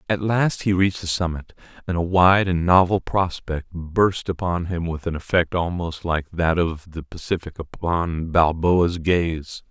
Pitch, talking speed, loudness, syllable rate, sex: 85 Hz, 165 wpm, -21 LUFS, 4.2 syllables/s, male